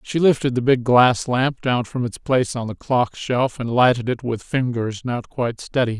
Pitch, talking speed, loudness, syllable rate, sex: 125 Hz, 220 wpm, -20 LUFS, 4.8 syllables/s, male